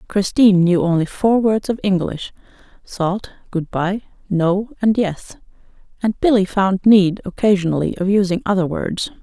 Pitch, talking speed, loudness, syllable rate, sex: 195 Hz, 145 wpm, -17 LUFS, 4.6 syllables/s, female